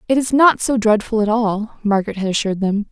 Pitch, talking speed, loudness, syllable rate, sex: 220 Hz, 225 wpm, -17 LUFS, 6.1 syllables/s, female